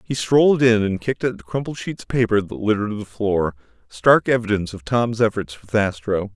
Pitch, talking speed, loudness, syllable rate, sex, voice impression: 110 Hz, 210 wpm, -20 LUFS, 5.7 syllables/s, male, masculine, adult-like, slightly thick, cool, intellectual, slightly refreshing